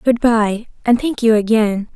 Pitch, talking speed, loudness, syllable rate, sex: 225 Hz, 185 wpm, -16 LUFS, 4.3 syllables/s, female